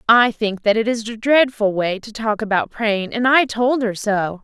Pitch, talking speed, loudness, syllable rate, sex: 220 Hz, 215 wpm, -18 LUFS, 4.2 syllables/s, female